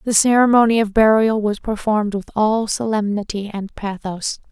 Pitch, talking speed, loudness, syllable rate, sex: 215 Hz, 145 wpm, -18 LUFS, 4.9 syllables/s, female